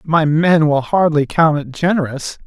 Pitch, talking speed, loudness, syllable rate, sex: 155 Hz, 170 wpm, -15 LUFS, 4.8 syllables/s, male